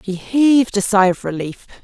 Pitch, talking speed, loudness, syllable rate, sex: 210 Hz, 195 wpm, -16 LUFS, 5.0 syllables/s, female